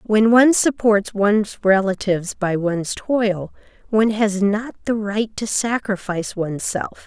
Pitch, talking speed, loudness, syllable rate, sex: 210 Hz, 145 wpm, -19 LUFS, 4.5 syllables/s, female